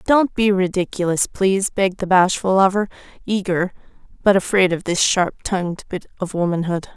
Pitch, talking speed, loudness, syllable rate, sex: 190 Hz, 155 wpm, -19 LUFS, 5.3 syllables/s, female